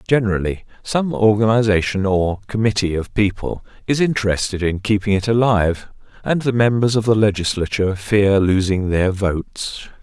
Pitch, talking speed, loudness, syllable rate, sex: 105 Hz, 140 wpm, -18 LUFS, 5.2 syllables/s, male